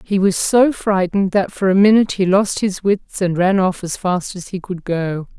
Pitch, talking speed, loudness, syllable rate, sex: 190 Hz, 235 wpm, -17 LUFS, 4.8 syllables/s, female